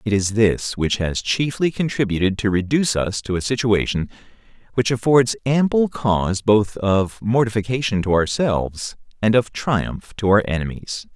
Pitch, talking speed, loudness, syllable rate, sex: 110 Hz, 150 wpm, -20 LUFS, 4.7 syllables/s, male